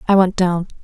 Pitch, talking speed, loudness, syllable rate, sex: 185 Hz, 215 wpm, -17 LUFS, 5.6 syllables/s, female